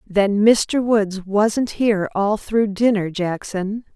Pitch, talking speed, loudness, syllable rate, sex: 205 Hz, 135 wpm, -19 LUFS, 3.2 syllables/s, female